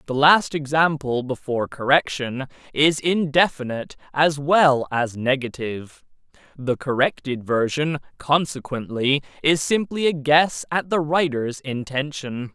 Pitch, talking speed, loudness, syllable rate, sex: 140 Hz, 110 wpm, -21 LUFS, 4.2 syllables/s, male